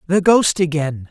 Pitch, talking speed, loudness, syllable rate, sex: 165 Hz, 165 wpm, -16 LUFS, 4.3 syllables/s, male